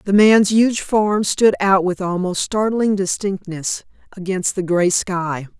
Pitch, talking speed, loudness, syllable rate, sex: 195 Hz, 150 wpm, -18 LUFS, 3.8 syllables/s, female